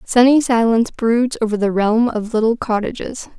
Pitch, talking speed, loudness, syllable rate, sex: 230 Hz, 160 wpm, -16 LUFS, 5.1 syllables/s, female